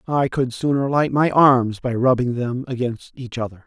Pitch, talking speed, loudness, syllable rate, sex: 130 Hz, 195 wpm, -19 LUFS, 4.7 syllables/s, male